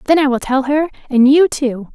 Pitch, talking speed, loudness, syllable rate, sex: 275 Hz, 245 wpm, -14 LUFS, 5.1 syllables/s, female